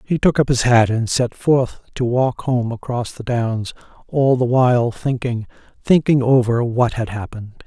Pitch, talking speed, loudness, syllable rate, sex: 125 Hz, 180 wpm, -18 LUFS, 4.5 syllables/s, male